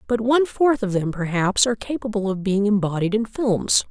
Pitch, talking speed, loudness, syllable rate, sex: 215 Hz, 200 wpm, -21 LUFS, 5.4 syllables/s, female